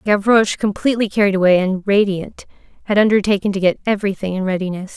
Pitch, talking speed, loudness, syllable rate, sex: 200 Hz, 155 wpm, -17 LUFS, 6.6 syllables/s, female